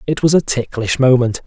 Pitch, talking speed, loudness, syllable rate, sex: 130 Hz, 205 wpm, -15 LUFS, 5.3 syllables/s, male